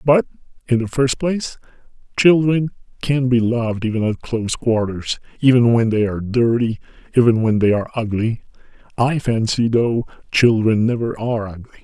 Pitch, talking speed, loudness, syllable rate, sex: 120 Hz, 150 wpm, -18 LUFS, 4.2 syllables/s, male